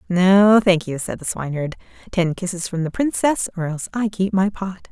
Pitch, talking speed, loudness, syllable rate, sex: 190 Hz, 210 wpm, -20 LUFS, 5.2 syllables/s, female